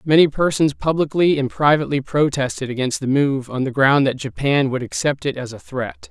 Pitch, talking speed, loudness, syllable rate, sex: 140 Hz, 195 wpm, -19 LUFS, 5.3 syllables/s, male